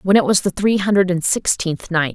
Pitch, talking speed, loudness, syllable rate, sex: 185 Hz, 250 wpm, -17 LUFS, 5.4 syllables/s, female